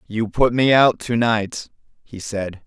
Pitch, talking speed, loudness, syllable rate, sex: 110 Hz, 180 wpm, -19 LUFS, 3.6 syllables/s, male